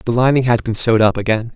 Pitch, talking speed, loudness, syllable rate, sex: 115 Hz, 270 wpm, -15 LUFS, 7.1 syllables/s, male